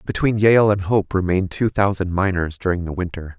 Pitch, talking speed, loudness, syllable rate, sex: 95 Hz, 195 wpm, -19 LUFS, 5.5 syllables/s, male